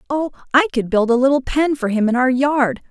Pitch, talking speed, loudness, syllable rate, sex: 260 Hz, 250 wpm, -17 LUFS, 5.5 syllables/s, female